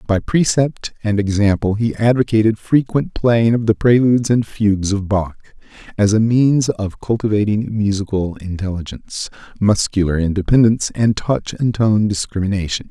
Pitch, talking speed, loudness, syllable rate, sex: 105 Hz, 135 wpm, -17 LUFS, 4.9 syllables/s, male